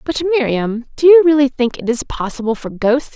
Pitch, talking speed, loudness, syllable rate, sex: 265 Hz, 210 wpm, -15 LUFS, 5.4 syllables/s, female